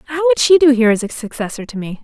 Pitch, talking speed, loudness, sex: 260 Hz, 295 wpm, -14 LUFS, female